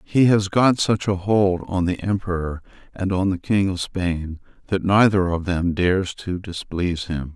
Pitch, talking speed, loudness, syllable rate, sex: 95 Hz, 190 wpm, -21 LUFS, 4.4 syllables/s, male